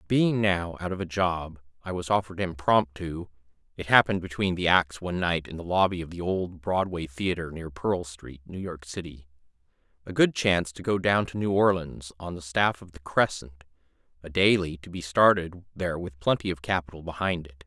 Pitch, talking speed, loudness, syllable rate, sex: 85 Hz, 195 wpm, -26 LUFS, 3.5 syllables/s, male